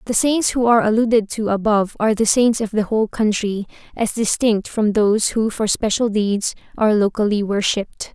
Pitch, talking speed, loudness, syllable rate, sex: 215 Hz, 185 wpm, -18 LUFS, 5.5 syllables/s, female